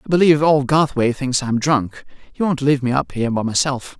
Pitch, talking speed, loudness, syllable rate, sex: 135 Hz, 225 wpm, -18 LUFS, 6.3 syllables/s, male